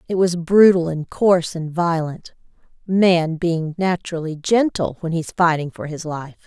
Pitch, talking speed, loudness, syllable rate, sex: 170 Hz, 150 wpm, -19 LUFS, 4.5 syllables/s, female